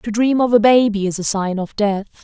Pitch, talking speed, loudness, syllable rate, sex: 215 Hz, 270 wpm, -16 LUFS, 5.0 syllables/s, female